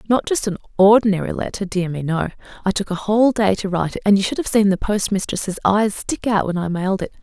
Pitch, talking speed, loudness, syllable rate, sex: 200 Hz, 250 wpm, -19 LUFS, 6.2 syllables/s, female